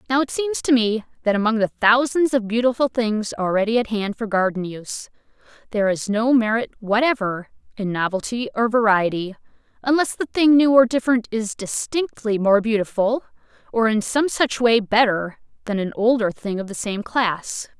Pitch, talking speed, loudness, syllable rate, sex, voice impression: 225 Hz, 170 wpm, -20 LUFS, 5.1 syllables/s, female, feminine, adult-like, tensed, powerful, clear, fluent, intellectual, calm, lively, slightly intense, slightly sharp, light